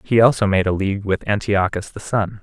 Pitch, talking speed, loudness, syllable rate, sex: 100 Hz, 225 wpm, -19 LUFS, 5.6 syllables/s, male